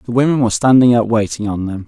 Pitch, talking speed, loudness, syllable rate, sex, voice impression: 115 Hz, 255 wpm, -14 LUFS, 6.9 syllables/s, male, masculine, adult-like, slightly refreshing, sincere, slightly unique